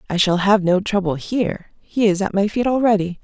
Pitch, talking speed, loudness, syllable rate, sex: 200 Hz, 220 wpm, -18 LUFS, 5.5 syllables/s, female